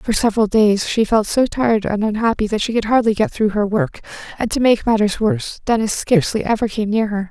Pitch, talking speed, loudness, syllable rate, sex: 215 Hz, 230 wpm, -17 LUFS, 5.9 syllables/s, female